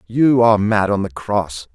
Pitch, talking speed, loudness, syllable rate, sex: 105 Hz, 205 wpm, -16 LUFS, 4.5 syllables/s, male